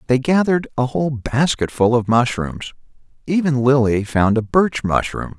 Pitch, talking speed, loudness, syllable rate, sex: 130 Hz, 145 wpm, -18 LUFS, 4.6 syllables/s, male